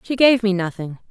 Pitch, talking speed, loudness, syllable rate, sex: 210 Hz, 215 wpm, -18 LUFS, 5.4 syllables/s, female